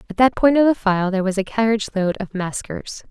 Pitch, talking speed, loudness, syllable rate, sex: 210 Hz, 250 wpm, -19 LUFS, 6.1 syllables/s, female